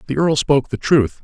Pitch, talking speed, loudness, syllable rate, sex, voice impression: 140 Hz, 245 wpm, -17 LUFS, 5.8 syllables/s, male, very masculine, very middle-aged, very thick, tensed, very powerful, bright, very soft, muffled, fluent, slightly raspy, very cool, intellectual, slightly refreshing, sincere, very calm, very mature, friendly, reassuring, very unique, slightly elegant, very wild, sweet, lively, kind